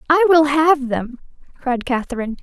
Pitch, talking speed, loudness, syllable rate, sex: 280 Hz, 150 wpm, -17 LUFS, 5.1 syllables/s, female